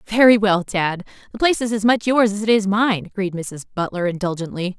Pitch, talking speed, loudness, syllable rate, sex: 200 Hz, 215 wpm, -19 LUFS, 5.6 syllables/s, female